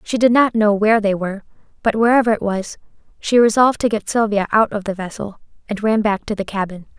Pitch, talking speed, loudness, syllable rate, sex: 215 Hz, 225 wpm, -17 LUFS, 6.2 syllables/s, female